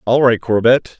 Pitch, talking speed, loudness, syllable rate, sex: 120 Hz, 180 wpm, -14 LUFS, 4.6 syllables/s, male